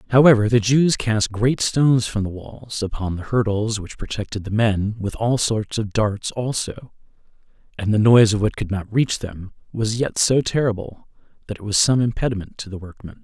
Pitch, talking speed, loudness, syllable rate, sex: 110 Hz, 195 wpm, -20 LUFS, 5.0 syllables/s, male